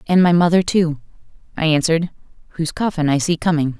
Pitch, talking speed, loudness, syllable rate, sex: 165 Hz, 175 wpm, -17 LUFS, 6.5 syllables/s, female